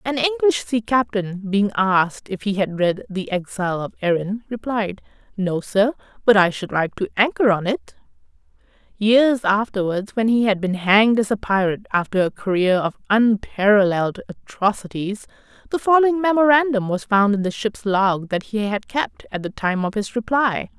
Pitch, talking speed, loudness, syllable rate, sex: 210 Hz, 175 wpm, -20 LUFS, 5.0 syllables/s, female